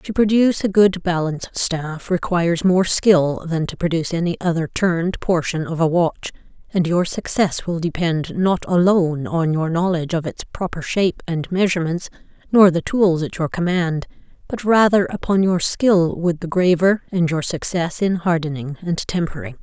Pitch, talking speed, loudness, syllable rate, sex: 175 Hz, 170 wpm, -19 LUFS, 4.9 syllables/s, female